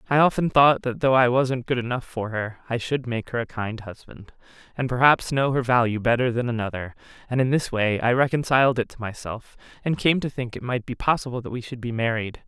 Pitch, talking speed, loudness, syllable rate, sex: 125 Hz, 230 wpm, -23 LUFS, 5.7 syllables/s, female